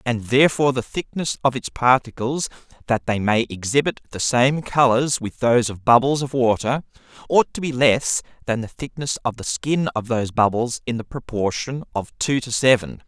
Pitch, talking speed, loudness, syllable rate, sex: 125 Hz, 185 wpm, -21 LUFS, 5.1 syllables/s, male